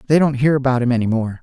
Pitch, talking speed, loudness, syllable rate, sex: 130 Hz, 295 wpm, -17 LUFS, 7.2 syllables/s, male